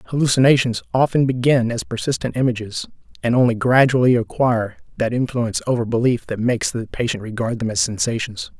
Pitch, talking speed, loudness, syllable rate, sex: 120 Hz, 155 wpm, -19 LUFS, 5.9 syllables/s, male